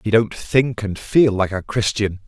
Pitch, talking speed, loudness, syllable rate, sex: 110 Hz, 210 wpm, -19 LUFS, 4.2 syllables/s, male